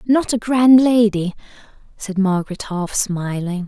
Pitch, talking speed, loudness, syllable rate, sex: 205 Hz, 130 wpm, -17 LUFS, 4.1 syllables/s, female